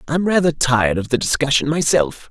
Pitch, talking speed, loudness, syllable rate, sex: 140 Hz, 180 wpm, -17 LUFS, 5.6 syllables/s, male